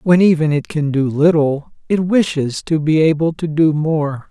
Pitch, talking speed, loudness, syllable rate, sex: 155 Hz, 195 wpm, -16 LUFS, 4.4 syllables/s, male